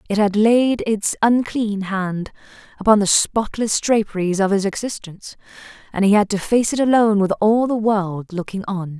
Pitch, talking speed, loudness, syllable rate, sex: 205 Hz, 175 wpm, -18 LUFS, 4.8 syllables/s, female